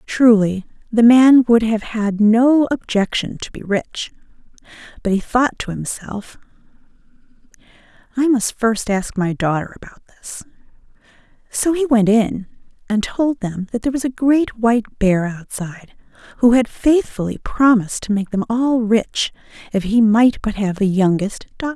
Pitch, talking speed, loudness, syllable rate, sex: 225 Hz, 155 wpm, -17 LUFS, 4.6 syllables/s, female